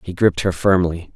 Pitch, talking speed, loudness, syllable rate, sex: 90 Hz, 210 wpm, -18 LUFS, 5.7 syllables/s, male